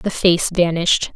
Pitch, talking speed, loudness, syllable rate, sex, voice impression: 175 Hz, 155 wpm, -17 LUFS, 4.8 syllables/s, female, very feminine, slightly young, adult-like, thin, tensed, slightly weak, bright, hard, very clear, fluent, slightly raspy, cute, slightly cool, intellectual, very refreshing, sincere, calm, friendly, reassuring, slightly elegant, wild, sweet, lively, kind, slightly intense, slightly sharp, slightly modest